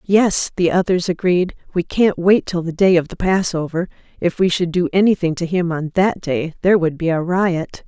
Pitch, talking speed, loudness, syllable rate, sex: 175 Hz, 215 wpm, -18 LUFS, 5.0 syllables/s, female